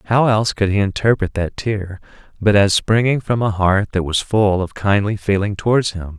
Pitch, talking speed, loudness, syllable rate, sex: 100 Hz, 205 wpm, -17 LUFS, 5.0 syllables/s, male